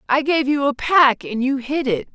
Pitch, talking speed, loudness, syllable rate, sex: 270 Hz, 250 wpm, -18 LUFS, 4.7 syllables/s, female